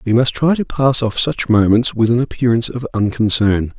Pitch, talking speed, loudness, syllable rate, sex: 120 Hz, 205 wpm, -15 LUFS, 5.3 syllables/s, male